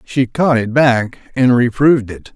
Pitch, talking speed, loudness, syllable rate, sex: 125 Hz, 180 wpm, -14 LUFS, 4.3 syllables/s, male